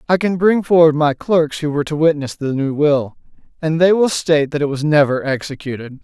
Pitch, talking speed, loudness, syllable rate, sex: 150 Hz, 220 wpm, -16 LUFS, 5.6 syllables/s, male